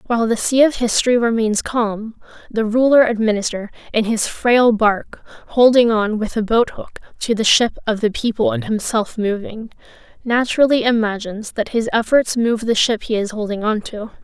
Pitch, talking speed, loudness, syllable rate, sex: 225 Hz, 175 wpm, -17 LUFS, 5.1 syllables/s, female